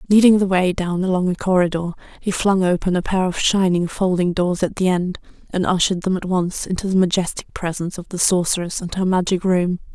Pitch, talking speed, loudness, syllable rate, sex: 185 Hz, 210 wpm, -19 LUFS, 5.7 syllables/s, female